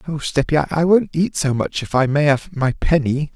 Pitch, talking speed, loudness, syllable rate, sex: 150 Hz, 230 wpm, -18 LUFS, 4.8 syllables/s, male